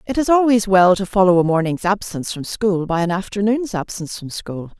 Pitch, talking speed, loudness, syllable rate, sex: 195 Hz, 215 wpm, -18 LUFS, 5.6 syllables/s, female